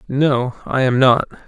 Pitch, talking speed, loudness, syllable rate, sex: 130 Hz, 160 wpm, -17 LUFS, 3.9 syllables/s, male